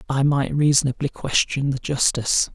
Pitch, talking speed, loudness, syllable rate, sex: 140 Hz, 140 wpm, -21 LUFS, 5.1 syllables/s, male